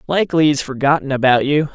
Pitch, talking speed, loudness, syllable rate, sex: 145 Hz, 170 wpm, -16 LUFS, 6.3 syllables/s, male